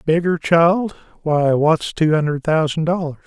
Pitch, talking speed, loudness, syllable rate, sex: 160 Hz, 130 wpm, -17 LUFS, 4.3 syllables/s, male